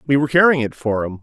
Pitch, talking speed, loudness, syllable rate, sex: 130 Hz, 295 wpm, -17 LUFS, 7.5 syllables/s, male